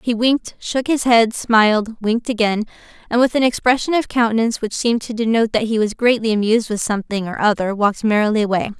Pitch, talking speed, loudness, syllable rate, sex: 225 Hz, 205 wpm, -17 LUFS, 6.4 syllables/s, female